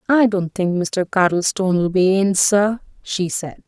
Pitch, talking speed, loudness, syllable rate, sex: 190 Hz, 165 wpm, -18 LUFS, 4.0 syllables/s, female